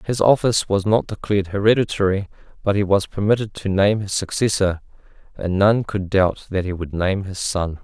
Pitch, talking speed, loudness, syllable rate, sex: 100 Hz, 185 wpm, -20 LUFS, 5.3 syllables/s, male